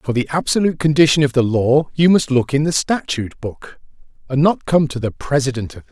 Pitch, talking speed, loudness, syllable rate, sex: 140 Hz, 235 wpm, -17 LUFS, 6.4 syllables/s, male